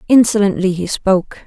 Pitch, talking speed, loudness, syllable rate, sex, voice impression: 195 Hz, 125 wpm, -15 LUFS, 5.4 syllables/s, female, very feminine, adult-like, thin, tensed, slightly weak, bright, soft, clear, slightly fluent, cute, intellectual, refreshing, sincere, calm, friendly, very reassuring, unique, very elegant, slightly wild, sweet, lively, very kind, modest, slightly light